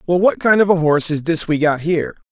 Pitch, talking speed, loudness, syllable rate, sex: 165 Hz, 285 wpm, -16 LUFS, 6.5 syllables/s, male